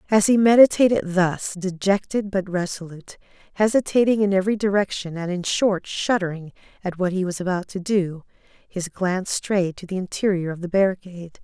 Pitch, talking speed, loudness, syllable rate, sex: 190 Hz, 165 wpm, -21 LUFS, 5.3 syllables/s, female